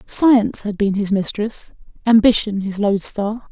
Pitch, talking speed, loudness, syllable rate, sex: 210 Hz, 155 wpm, -18 LUFS, 4.3 syllables/s, female